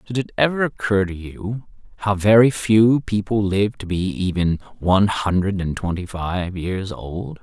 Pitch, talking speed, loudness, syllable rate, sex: 100 Hz, 170 wpm, -20 LUFS, 4.3 syllables/s, male